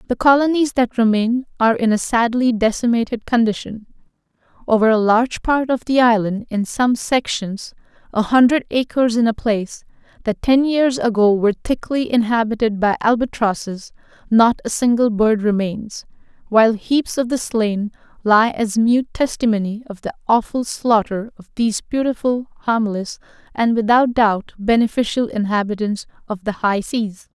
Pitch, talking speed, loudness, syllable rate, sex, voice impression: 230 Hz, 145 wpm, -18 LUFS, 4.8 syllables/s, female, feminine, adult-like, powerful, bright, soft, fluent, intellectual, slightly calm, friendly, reassuring, lively, slightly kind